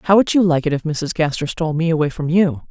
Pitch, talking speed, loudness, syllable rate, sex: 160 Hz, 290 wpm, -18 LUFS, 6.4 syllables/s, female